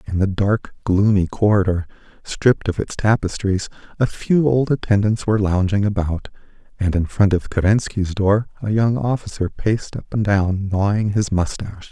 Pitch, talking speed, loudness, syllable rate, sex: 100 Hz, 160 wpm, -19 LUFS, 4.9 syllables/s, male